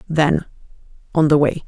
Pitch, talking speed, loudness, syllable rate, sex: 155 Hz, 145 wpm, -18 LUFS, 4.9 syllables/s, female